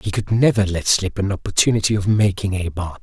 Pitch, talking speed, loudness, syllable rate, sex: 100 Hz, 220 wpm, -19 LUFS, 6.0 syllables/s, male